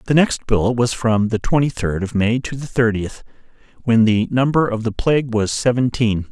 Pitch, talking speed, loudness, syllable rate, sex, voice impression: 120 Hz, 200 wpm, -18 LUFS, 4.9 syllables/s, male, masculine, adult-like, thick, tensed, powerful, slightly hard, clear, fluent, calm, slightly mature, friendly, reassuring, wild, lively, slightly kind